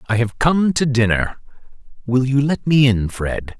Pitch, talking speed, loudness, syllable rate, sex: 125 Hz, 185 wpm, -18 LUFS, 4.4 syllables/s, male